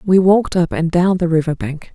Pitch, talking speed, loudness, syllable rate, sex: 175 Hz, 245 wpm, -16 LUFS, 5.4 syllables/s, female